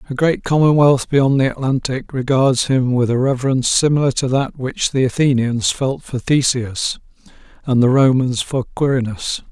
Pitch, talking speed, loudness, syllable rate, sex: 130 Hz, 160 wpm, -17 LUFS, 4.8 syllables/s, male